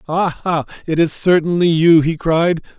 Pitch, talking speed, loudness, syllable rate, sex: 165 Hz, 150 wpm, -15 LUFS, 4.0 syllables/s, male